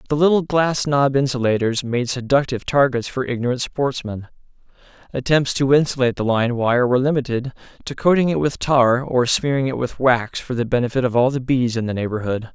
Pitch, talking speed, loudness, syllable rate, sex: 130 Hz, 185 wpm, -19 LUFS, 5.6 syllables/s, male